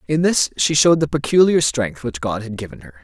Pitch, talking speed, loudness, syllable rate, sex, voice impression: 125 Hz, 235 wpm, -17 LUFS, 5.7 syllables/s, male, masculine, adult-like, tensed, fluent, intellectual, refreshing, calm, slightly elegant